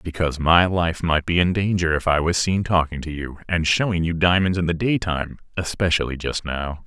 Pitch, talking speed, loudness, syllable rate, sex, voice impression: 85 Hz, 200 wpm, -21 LUFS, 5.3 syllables/s, male, masculine, adult-like, tensed, powerful, bright, clear, fluent, cool, intellectual, mature, friendly, reassuring, wild, lively, slightly strict